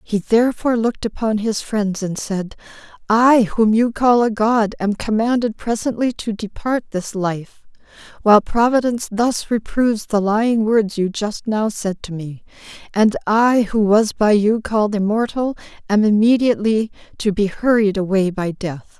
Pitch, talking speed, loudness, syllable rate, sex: 215 Hz, 160 wpm, -18 LUFS, 4.6 syllables/s, female